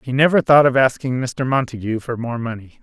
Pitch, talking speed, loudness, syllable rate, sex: 125 Hz, 210 wpm, -18 LUFS, 5.5 syllables/s, male